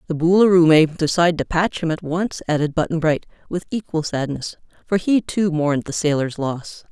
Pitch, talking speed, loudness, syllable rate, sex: 165 Hz, 190 wpm, -19 LUFS, 5.3 syllables/s, female